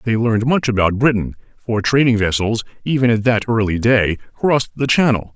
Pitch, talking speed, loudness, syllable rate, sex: 115 Hz, 180 wpm, -17 LUFS, 5.6 syllables/s, male